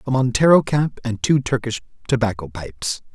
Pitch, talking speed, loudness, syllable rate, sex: 125 Hz, 155 wpm, -20 LUFS, 5.3 syllables/s, male